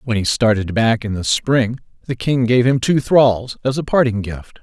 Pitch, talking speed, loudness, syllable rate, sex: 120 Hz, 220 wpm, -17 LUFS, 4.6 syllables/s, male